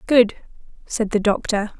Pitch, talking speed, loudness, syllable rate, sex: 215 Hz, 135 wpm, -20 LUFS, 4.1 syllables/s, female